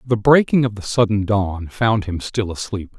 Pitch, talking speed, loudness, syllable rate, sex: 105 Hz, 200 wpm, -19 LUFS, 4.5 syllables/s, male